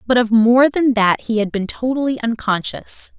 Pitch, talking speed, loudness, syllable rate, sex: 235 Hz, 190 wpm, -17 LUFS, 4.6 syllables/s, female